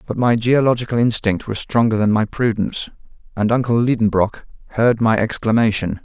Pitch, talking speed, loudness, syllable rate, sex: 110 Hz, 150 wpm, -18 LUFS, 5.6 syllables/s, male